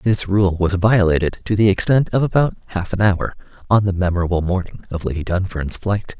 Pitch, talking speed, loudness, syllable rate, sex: 95 Hz, 195 wpm, -18 LUFS, 5.4 syllables/s, male